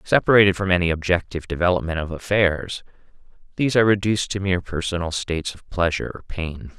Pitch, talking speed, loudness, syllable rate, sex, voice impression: 90 Hz, 160 wpm, -21 LUFS, 6.6 syllables/s, male, masculine, adult-like, tensed, slightly dark, clear, fluent, intellectual, calm, reassuring, slightly kind, modest